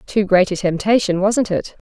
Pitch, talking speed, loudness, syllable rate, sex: 195 Hz, 190 wpm, -17 LUFS, 4.8 syllables/s, female